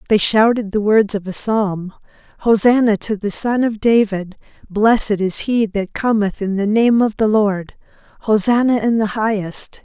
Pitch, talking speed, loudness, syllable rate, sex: 215 Hz, 170 wpm, -16 LUFS, 4.5 syllables/s, female